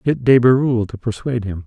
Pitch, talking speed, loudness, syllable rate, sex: 115 Hz, 215 wpm, -17 LUFS, 6.4 syllables/s, male